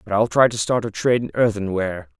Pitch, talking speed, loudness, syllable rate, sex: 105 Hz, 275 wpm, -20 LUFS, 7.1 syllables/s, male